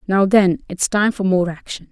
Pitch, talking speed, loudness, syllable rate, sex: 190 Hz, 220 wpm, -17 LUFS, 4.7 syllables/s, female